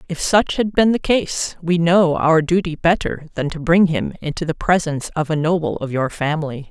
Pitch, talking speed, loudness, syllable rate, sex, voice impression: 165 Hz, 215 wpm, -18 LUFS, 5.1 syllables/s, female, gender-neutral, adult-like, refreshing, unique